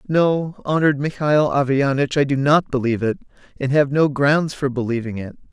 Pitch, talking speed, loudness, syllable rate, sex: 140 Hz, 175 wpm, -19 LUFS, 5.5 syllables/s, male